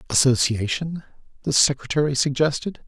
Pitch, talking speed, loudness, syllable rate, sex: 135 Hz, 85 wpm, -21 LUFS, 5.3 syllables/s, male